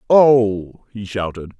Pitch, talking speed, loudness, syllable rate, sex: 110 Hz, 115 wpm, -17 LUFS, 3.2 syllables/s, male